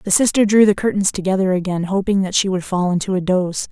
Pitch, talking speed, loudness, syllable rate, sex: 190 Hz, 240 wpm, -17 LUFS, 6.3 syllables/s, female